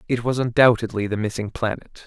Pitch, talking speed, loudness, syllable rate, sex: 115 Hz, 175 wpm, -21 LUFS, 5.8 syllables/s, male